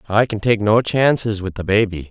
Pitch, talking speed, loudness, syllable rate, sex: 105 Hz, 230 wpm, -17 LUFS, 5.2 syllables/s, male